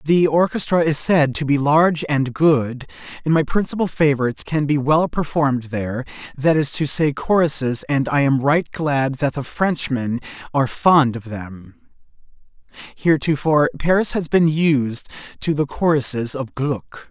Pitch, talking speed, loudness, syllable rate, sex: 145 Hz, 155 wpm, -19 LUFS, 4.6 syllables/s, male